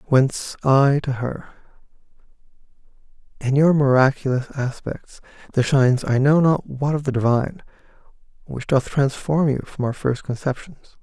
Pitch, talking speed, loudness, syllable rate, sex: 135 Hz, 135 wpm, -20 LUFS, 5.0 syllables/s, male